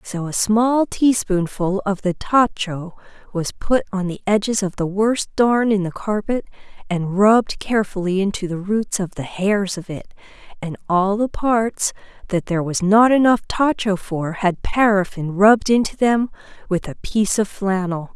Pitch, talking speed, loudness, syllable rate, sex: 200 Hz, 170 wpm, -19 LUFS, 4.5 syllables/s, female